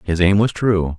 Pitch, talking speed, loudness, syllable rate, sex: 95 Hz, 245 wpm, -17 LUFS, 4.5 syllables/s, male